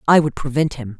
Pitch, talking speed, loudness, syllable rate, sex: 135 Hz, 240 wpm, -19 LUFS, 6.0 syllables/s, female